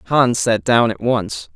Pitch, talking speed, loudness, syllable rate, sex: 115 Hz, 195 wpm, -17 LUFS, 3.4 syllables/s, male